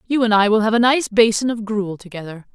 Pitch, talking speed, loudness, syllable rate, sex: 215 Hz, 260 wpm, -17 LUFS, 5.8 syllables/s, female